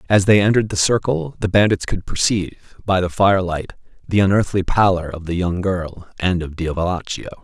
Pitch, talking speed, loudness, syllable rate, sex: 95 Hz, 180 wpm, -18 LUFS, 5.5 syllables/s, male